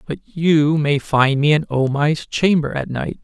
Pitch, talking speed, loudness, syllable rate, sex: 150 Hz, 205 wpm, -17 LUFS, 4.0 syllables/s, male